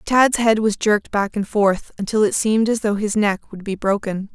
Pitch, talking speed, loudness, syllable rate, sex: 210 Hz, 235 wpm, -19 LUFS, 5.0 syllables/s, female